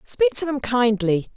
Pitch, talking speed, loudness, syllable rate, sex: 250 Hz, 175 wpm, -20 LUFS, 4.0 syllables/s, female